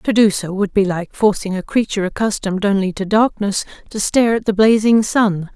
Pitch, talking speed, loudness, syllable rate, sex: 205 Hz, 205 wpm, -17 LUFS, 5.5 syllables/s, female